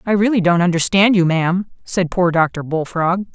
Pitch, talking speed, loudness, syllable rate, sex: 180 Hz, 180 wpm, -16 LUFS, 4.9 syllables/s, female